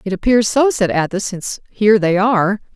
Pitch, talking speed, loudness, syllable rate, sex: 205 Hz, 195 wpm, -15 LUFS, 5.7 syllables/s, female